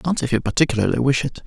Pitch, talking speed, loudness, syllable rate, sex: 135 Hz, 245 wpm, -20 LUFS, 7.4 syllables/s, male